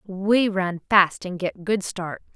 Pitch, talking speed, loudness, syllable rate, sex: 190 Hz, 180 wpm, -22 LUFS, 3.4 syllables/s, female